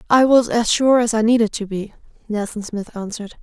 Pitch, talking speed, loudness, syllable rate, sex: 220 Hz, 210 wpm, -18 LUFS, 5.6 syllables/s, female